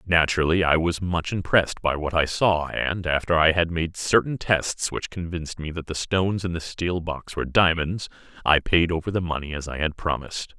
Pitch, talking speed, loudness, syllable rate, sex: 85 Hz, 210 wpm, -23 LUFS, 5.3 syllables/s, male